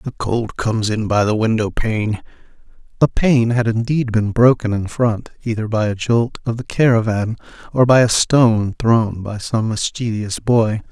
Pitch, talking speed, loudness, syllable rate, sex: 115 Hz, 175 wpm, -17 LUFS, 4.5 syllables/s, male